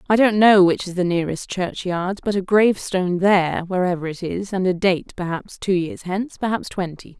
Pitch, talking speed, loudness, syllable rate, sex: 185 Hz, 200 wpm, -20 LUFS, 5.4 syllables/s, female